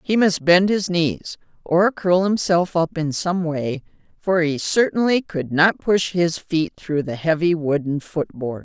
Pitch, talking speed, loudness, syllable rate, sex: 170 Hz, 180 wpm, -20 LUFS, 3.9 syllables/s, female